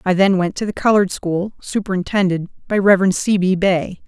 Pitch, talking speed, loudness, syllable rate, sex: 190 Hz, 190 wpm, -17 LUFS, 5.2 syllables/s, female